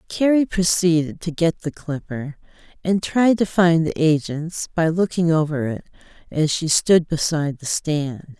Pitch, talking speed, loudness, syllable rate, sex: 165 Hz, 155 wpm, -20 LUFS, 4.3 syllables/s, female